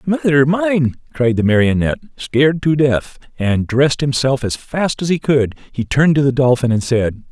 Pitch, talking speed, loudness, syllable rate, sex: 135 Hz, 190 wpm, -16 LUFS, 5.0 syllables/s, male